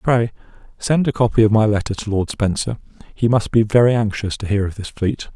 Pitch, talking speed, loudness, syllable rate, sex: 110 Hz, 225 wpm, -18 LUFS, 5.6 syllables/s, male